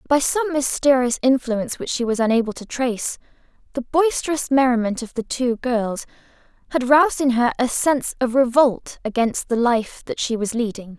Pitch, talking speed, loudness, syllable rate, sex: 250 Hz, 175 wpm, -20 LUFS, 5.1 syllables/s, female